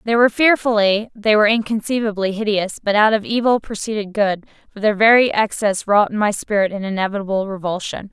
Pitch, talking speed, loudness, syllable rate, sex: 210 Hz, 170 wpm, -17 LUFS, 5.9 syllables/s, female